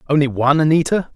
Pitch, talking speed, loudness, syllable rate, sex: 150 Hz, 155 wpm, -16 LUFS, 7.5 syllables/s, male